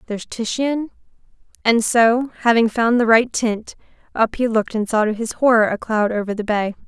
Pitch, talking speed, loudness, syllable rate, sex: 225 Hz, 190 wpm, -18 LUFS, 5.3 syllables/s, female